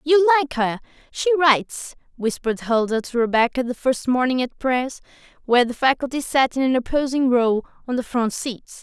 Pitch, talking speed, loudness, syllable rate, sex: 255 Hz, 175 wpm, -20 LUFS, 5.2 syllables/s, female